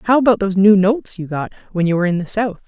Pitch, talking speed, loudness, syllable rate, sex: 200 Hz, 290 wpm, -16 LUFS, 7.5 syllables/s, female